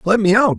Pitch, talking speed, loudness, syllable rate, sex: 195 Hz, 310 wpm, -14 LUFS, 6.1 syllables/s, male